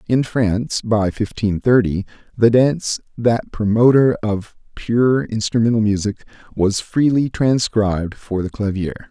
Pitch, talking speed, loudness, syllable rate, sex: 110 Hz, 125 wpm, -18 LUFS, 4.3 syllables/s, male